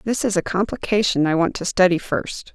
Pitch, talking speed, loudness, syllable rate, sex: 190 Hz, 210 wpm, -20 LUFS, 5.4 syllables/s, female